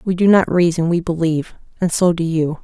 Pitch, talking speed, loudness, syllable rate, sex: 170 Hz, 205 wpm, -17 LUFS, 5.7 syllables/s, female